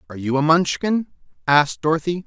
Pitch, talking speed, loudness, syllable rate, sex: 160 Hz, 160 wpm, -19 LUFS, 6.3 syllables/s, male